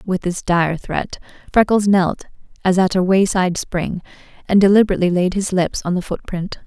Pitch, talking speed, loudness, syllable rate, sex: 185 Hz, 170 wpm, -17 LUFS, 5.1 syllables/s, female